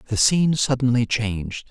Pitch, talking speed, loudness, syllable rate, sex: 120 Hz, 140 wpm, -20 LUFS, 5.4 syllables/s, male